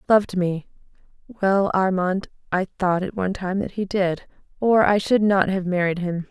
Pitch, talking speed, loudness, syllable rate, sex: 190 Hz, 170 wpm, -22 LUFS, 4.9 syllables/s, female